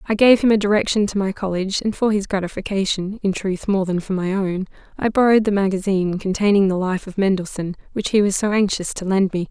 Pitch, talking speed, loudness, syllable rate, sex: 195 Hz, 225 wpm, -19 LUFS, 6.1 syllables/s, female